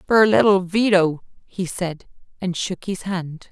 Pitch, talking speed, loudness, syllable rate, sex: 185 Hz, 155 wpm, -20 LUFS, 3.9 syllables/s, female